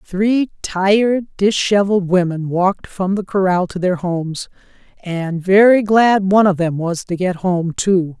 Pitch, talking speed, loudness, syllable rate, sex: 190 Hz, 160 wpm, -16 LUFS, 4.3 syllables/s, female